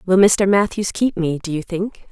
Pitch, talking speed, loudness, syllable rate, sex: 190 Hz, 225 wpm, -18 LUFS, 4.7 syllables/s, female